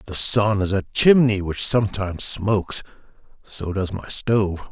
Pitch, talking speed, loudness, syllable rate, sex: 100 Hz, 155 wpm, -20 LUFS, 4.6 syllables/s, male